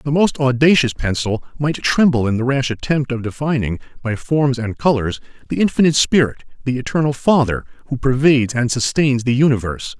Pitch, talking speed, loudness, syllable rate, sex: 130 Hz, 170 wpm, -17 LUFS, 5.7 syllables/s, male